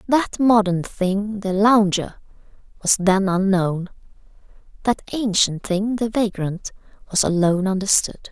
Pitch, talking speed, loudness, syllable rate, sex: 200 Hz, 115 wpm, -20 LUFS, 4.1 syllables/s, female